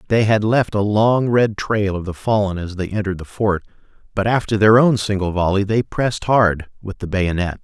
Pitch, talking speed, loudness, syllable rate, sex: 105 Hz, 210 wpm, -18 LUFS, 5.2 syllables/s, male